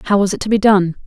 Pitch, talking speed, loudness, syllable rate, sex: 200 Hz, 335 wpm, -15 LUFS, 6.4 syllables/s, female